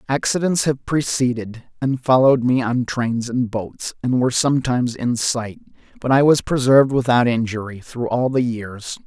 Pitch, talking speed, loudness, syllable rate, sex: 125 Hz, 165 wpm, -19 LUFS, 4.9 syllables/s, male